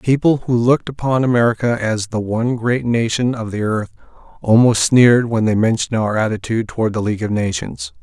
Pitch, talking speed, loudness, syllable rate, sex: 115 Hz, 185 wpm, -17 LUFS, 5.9 syllables/s, male